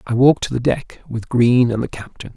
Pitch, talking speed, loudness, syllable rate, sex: 120 Hz, 230 wpm, -17 LUFS, 5.2 syllables/s, male